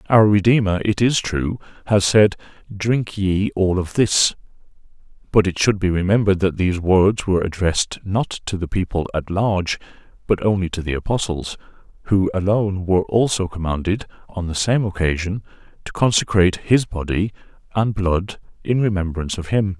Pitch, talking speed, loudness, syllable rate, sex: 95 Hz, 160 wpm, -19 LUFS, 5.2 syllables/s, male